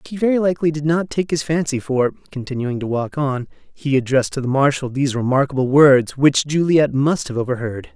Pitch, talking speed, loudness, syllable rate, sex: 140 Hz, 205 wpm, -18 LUFS, 5.8 syllables/s, male